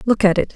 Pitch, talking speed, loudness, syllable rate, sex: 205 Hz, 325 wpm, -17 LUFS, 7.0 syllables/s, female